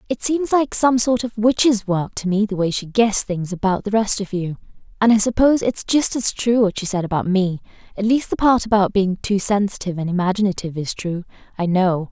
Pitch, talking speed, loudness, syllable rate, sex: 205 Hz, 225 wpm, -19 LUFS, 5.6 syllables/s, female